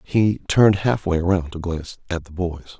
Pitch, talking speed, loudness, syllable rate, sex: 90 Hz, 195 wpm, -21 LUFS, 5.6 syllables/s, male